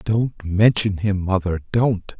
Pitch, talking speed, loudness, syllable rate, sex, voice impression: 100 Hz, 135 wpm, -20 LUFS, 3.7 syllables/s, male, masculine, middle-aged, tensed, slightly weak, muffled, slightly halting, cool, intellectual, calm, mature, friendly, reassuring, wild, kind